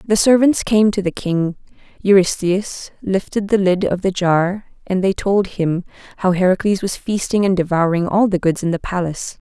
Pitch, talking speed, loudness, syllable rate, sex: 190 Hz, 185 wpm, -17 LUFS, 4.9 syllables/s, female